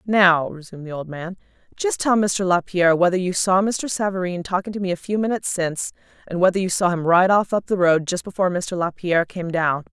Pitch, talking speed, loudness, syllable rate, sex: 185 Hz, 225 wpm, -20 LUFS, 5.9 syllables/s, female